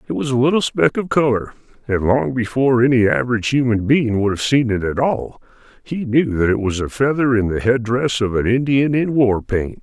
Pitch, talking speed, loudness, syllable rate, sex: 120 Hz, 220 wpm, -17 LUFS, 5.4 syllables/s, male